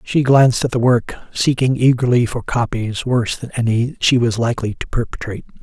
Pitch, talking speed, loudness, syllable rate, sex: 120 Hz, 180 wpm, -17 LUFS, 5.6 syllables/s, male